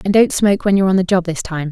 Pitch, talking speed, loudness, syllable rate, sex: 185 Hz, 350 wpm, -15 LUFS, 7.5 syllables/s, female